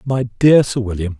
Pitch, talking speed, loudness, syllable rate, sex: 115 Hz, 200 wpm, -15 LUFS, 4.6 syllables/s, male